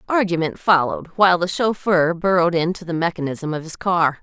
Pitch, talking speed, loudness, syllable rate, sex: 175 Hz, 170 wpm, -19 LUFS, 5.8 syllables/s, female